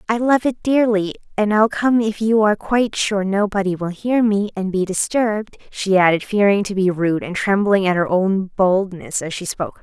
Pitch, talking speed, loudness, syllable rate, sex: 200 Hz, 210 wpm, -18 LUFS, 5.0 syllables/s, female